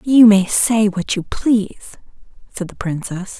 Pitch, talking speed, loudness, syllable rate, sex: 205 Hz, 160 wpm, -16 LUFS, 4.1 syllables/s, female